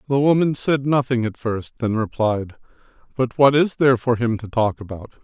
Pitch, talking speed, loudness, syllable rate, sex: 120 Hz, 195 wpm, -20 LUFS, 5.1 syllables/s, male